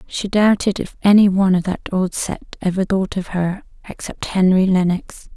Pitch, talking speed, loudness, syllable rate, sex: 190 Hz, 180 wpm, -18 LUFS, 4.9 syllables/s, female